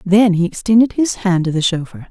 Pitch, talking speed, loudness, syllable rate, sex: 190 Hz, 230 wpm, -15 LUFS, 5.5 syllables/s, female